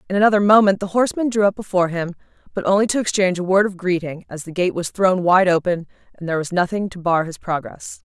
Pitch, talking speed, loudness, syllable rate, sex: 185 Hz, 235 wpm, -19 LUFS, 6.6 syllables/s, female